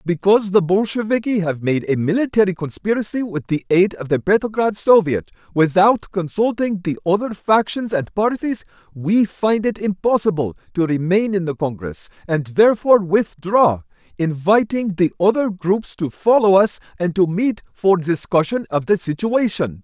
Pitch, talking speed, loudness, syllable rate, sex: 190 Hz, 150 wpm, -18 LUFS, 4.8 syllables/s, male